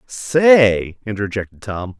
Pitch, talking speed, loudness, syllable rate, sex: 110 Hz, 90 wpm, -16 LUFS, 3.4 syllables/s, male